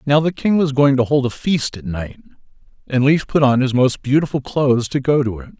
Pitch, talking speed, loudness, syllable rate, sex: 135 Hz, 245 wpm, -17 LUFS, 5.5 syllables/s, male